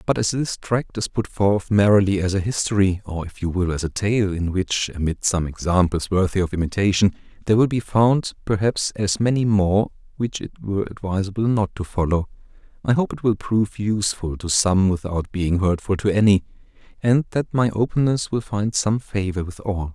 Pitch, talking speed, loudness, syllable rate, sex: 100 Hz, 195 wpm, -21 LUFS, 5.2 syllables/s, male